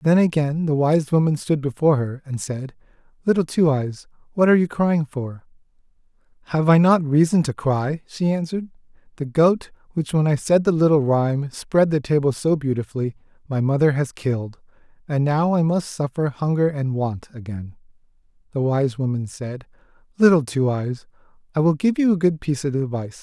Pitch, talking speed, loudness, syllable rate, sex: 145 Hz, 180 wpm, -21 LUFS, 5.2 syllables/s, male